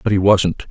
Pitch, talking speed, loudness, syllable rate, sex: 100 Hz, 255 wpm, -15 LUFS, 4.6 syllables/s, male